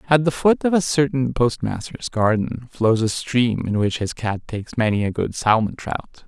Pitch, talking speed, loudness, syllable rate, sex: 120 Hz, 210 wpm, -21 LUFS, 4.7 syllables/s, male